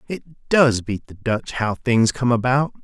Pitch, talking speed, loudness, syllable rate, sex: 120 Hz, 190 wpm, -20 LUFS, 3.9 syllables/s, male